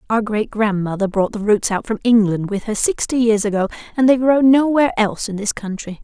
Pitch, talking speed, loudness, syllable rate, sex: 220 Hz, 220 wpm, -17 LUFS, 5.7 syllables/s, female